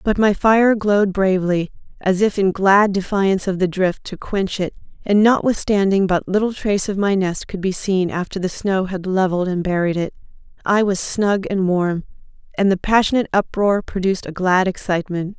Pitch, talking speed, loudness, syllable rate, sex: 190 Hz, 185 wpm, -18 LUFS, 5.2 syllables/s, female